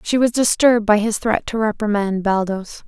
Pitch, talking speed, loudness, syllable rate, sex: 215 Hz, 190 wpm, -18 LUFS, 5.1 syllables/s, female